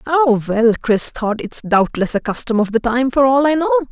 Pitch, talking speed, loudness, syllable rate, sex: 250 Hz, 230 wpm, -16 LUFS, 4.9 syllables/s, female